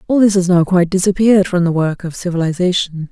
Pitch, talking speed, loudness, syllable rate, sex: 180 Hz, 210 wpm, -14 LUFS, 6.5 syllables/s, female